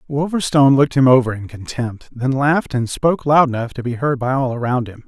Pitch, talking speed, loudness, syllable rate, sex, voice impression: 130 Hz, 225 wpm, -17 LUFS, 5.9 syllables/s, male, very masculine, very adult-like, middle-aged, thick, tensed, slightly powerful, slightly bright, soft, slightly clear, fluent, cool, intellectual, slightly refreshing, sincere, calm, mature, friendly, reassuring, elegant, slightly sweet, slightly lively, kind